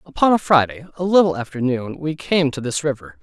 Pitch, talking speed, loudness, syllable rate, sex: 145 Hz, 225 wpm, -19 LUFS, 5.8 syllables/s, male